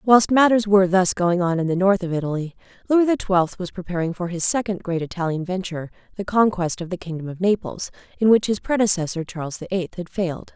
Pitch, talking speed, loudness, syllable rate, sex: 185 Hz, 215 wpm, -21 LUFS, 6.0 syllables/s, female